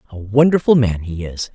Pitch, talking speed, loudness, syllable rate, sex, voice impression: 115 Hz, 195 wpm, -17 LUFS, 5.4 syllables/s, female, slightly gender-neutral, adult-like, calm